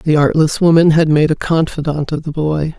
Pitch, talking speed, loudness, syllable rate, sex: 155 Hz, 215 wpm, -14 LUFS, 5.1 syllables/s, female